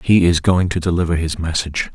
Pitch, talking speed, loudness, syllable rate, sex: 85 Hz, 215 wpm, -17 LUFS, 5.8 syllables/s, male